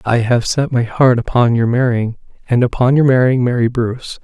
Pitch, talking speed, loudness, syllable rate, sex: 120 Hz, 200 wpm, -14 LUFS, 5.3 syllables/s, male